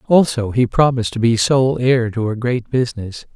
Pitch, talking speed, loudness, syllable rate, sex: 120 Hz, 195 wpm, -17 LUFS, 5.0 syllables/s, male